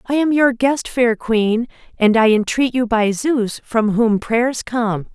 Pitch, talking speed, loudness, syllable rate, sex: 235 Hz, 185 wpm, -17 LUFS, 3.7 syllables/s, female